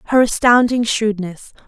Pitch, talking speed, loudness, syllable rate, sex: 225 Hz, 105 wpm, -15 LUFS, 4.6 syllables/s, female